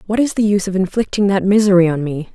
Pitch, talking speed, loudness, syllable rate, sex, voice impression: 195 Hz, 255 wpm, -15 LUFS, 6.9 syllables/s, female, feminine, adult-like, tensed, powerful, soft, slightly muffled, intellectual, calm, reassuring, elegant, lively, kind